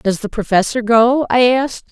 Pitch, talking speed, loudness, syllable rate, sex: 235 Hz, 190 wpm, -14 LUFS, 5.0 syllables/s, female